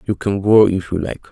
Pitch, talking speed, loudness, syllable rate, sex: 95 Hz, 275 wpm, -16 LUFS, 5.3 syllables/s, male